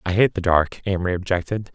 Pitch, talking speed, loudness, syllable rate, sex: 95 Hz, 205 wpm, -21 LUFS, 6.3 syllables/s, male